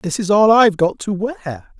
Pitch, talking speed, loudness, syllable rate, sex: 195 Hz, 235 wpm, -15 LUFS, 4.7 syllables/s, male